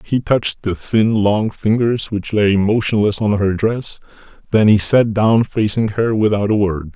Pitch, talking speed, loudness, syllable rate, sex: 105 Hz, 180 wpm, -16 LUFS, 4.3 syllables/s, male